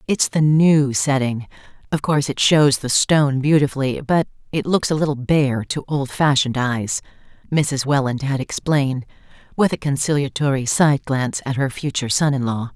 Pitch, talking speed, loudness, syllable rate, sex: 140 Hz, 165 wpm, -19 LUFS, 5.1 syllables/s, female